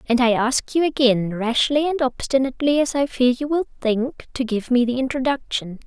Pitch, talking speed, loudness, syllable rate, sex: 255 Hz, 175 wpm, -20 LUFS, 5.1 syllables/s, female